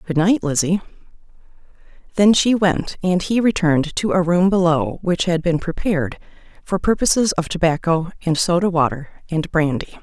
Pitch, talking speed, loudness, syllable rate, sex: 175 Hz, 155 wpm, -18 LUFS, 5.1 syllables/s, female